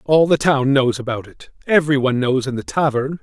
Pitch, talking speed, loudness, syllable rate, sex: 140 Hz, 205 wpm, -18 LUFS, 5.7 syllables/s, male